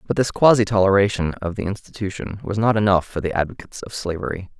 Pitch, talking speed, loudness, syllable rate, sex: 100 Hz, 195 wpm, -20 LUFS, 6.4 syllables/s, male